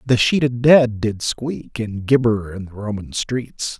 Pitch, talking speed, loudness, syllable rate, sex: 115 Hz, 175 wpm, -19 LUFS, 3.8 syllables/s, male